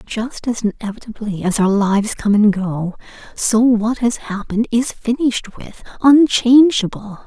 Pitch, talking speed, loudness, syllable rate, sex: 225 Hz, 140 wpm, -16 LUFS, 4.4 syllables/s, female